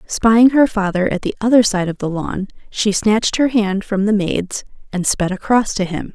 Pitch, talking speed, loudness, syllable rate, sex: 205 Hz, 215 wpm, -17 LUFS, 4.8 syllables/s, female